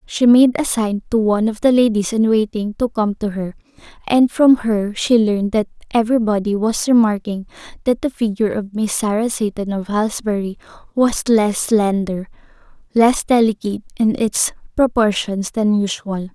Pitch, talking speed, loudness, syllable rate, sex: 215 Hz, 160 wpm, -17 LUFS, 4.8 syllables/s, female